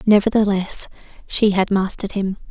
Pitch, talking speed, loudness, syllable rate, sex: 200 Hz, 120 wpm, -19 LUFS, 5.3 syllables/s, female